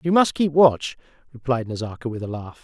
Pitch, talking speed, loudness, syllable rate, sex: 130 Hz, 205 wpm, -21 LUFS, 5.6 syllables/s, male